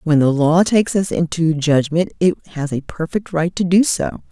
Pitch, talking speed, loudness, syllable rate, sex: 170 Hz, 210 wpm, -17 LUFS, 4.7 syllables/s, female